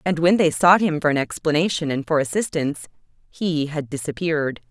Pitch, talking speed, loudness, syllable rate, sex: 160 Hz, 180 wpm, -21 LUFS, 5.6 syllables/s, female